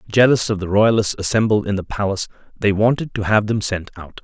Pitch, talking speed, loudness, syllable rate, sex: 105 Hz, 210 wpm, -18 LUFS, 6.1 syllables/s, male